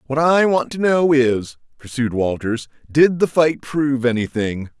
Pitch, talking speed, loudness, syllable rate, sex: 135 Hz, 165 wpm, -18 LUFS, 4.3 syllables/s, male